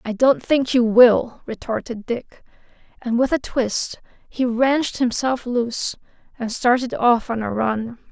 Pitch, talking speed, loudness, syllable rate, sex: 240 Hz, 155 wpm, -20 LUFS, 4.1 syllables/s, female